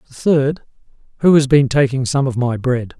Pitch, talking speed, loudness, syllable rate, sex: 135 Hz, 200 wpm, -16 LUFS, 5.0 syllables/s, male